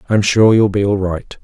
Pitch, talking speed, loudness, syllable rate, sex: 100 Hz, 250 wpm, -14 LUFS, 4.9 syllables/s, male